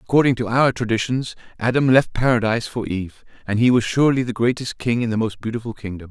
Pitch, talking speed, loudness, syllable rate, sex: 115 Hz, 205 wpm, -20 LUFS, 6.4 syllables/s, male